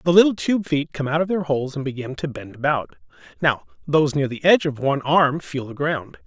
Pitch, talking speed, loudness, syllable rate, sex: 145 Hz, 240 wpm, -21 LUFS, 6.0 syllables/s, male